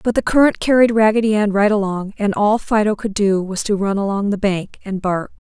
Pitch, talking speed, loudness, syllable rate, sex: 205 Hz, 230 wpm, -17 LUFS, 5.4 syllables/s, female